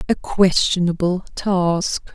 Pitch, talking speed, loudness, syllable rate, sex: 180 Hz, 85 wpm, -19 LUFS, 3.4 syllables/s, female